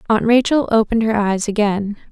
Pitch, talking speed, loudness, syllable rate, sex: 215 Hz, 170 wpm, -17 LUFS, 5.6 syllables/s, female